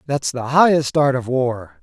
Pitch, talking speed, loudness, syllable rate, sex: 135 Hz, 230 wpm, -18 LUFS, 4.2 syllables/s, male